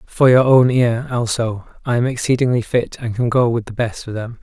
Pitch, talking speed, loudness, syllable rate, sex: 120 Hz, 230 wpm, -17 LUFS, 5.2 syllables/s, male